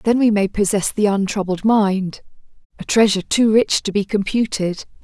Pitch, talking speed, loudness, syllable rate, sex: 205 Hz, 165 wpm, -18 LUFS, 4.9 syllables/s, female